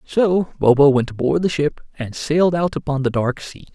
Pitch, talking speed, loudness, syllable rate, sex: 150 Hz, 210 wpm, -18 LUFS, 5.0 syllables/s, male